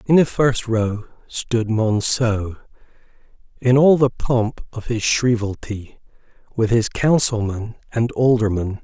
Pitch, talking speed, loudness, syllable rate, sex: 115 Hz, 120 wpm, -19 LUFS, 3.7 syllables/s, male